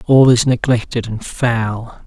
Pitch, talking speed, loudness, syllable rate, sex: 115 Hz, 145 wpm, -16 LUFS, 3.7 syllables/s, male